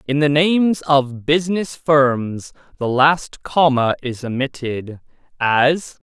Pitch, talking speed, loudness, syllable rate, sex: 140 Hz, 120 wpm, -18 LUFS, 3.5 syllables/s, male